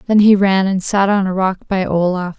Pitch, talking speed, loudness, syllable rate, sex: 190 Hz, 250 wpm, -15 LUFS, 5.0 syllables/s, female